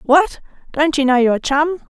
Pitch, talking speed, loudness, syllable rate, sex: 290 Hz, 185 wpm, -16 LUFS, 3.9 syllables/s, female